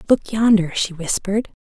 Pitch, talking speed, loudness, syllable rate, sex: 200 Hz, 145 wpm, -19 LUFS, 5.3 syllables/s, female